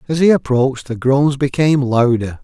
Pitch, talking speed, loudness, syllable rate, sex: 135 Hz, 175 wpm, -15 LUFS, 5.3 syllables/s, male